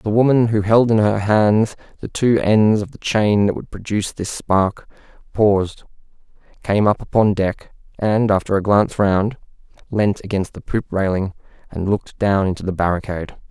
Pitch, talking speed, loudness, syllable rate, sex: 105 Hz, 175 wpm, -18 LUFS, 4.9 syllables/s, male